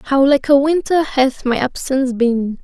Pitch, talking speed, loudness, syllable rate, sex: 270 Hz, 180 wpm, -16 LUFS, 4.3 syllables/s, female